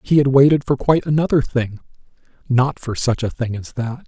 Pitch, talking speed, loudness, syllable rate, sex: 130 Hz, 205 wpm, -18 LUFS, 5.5 syllables/s, male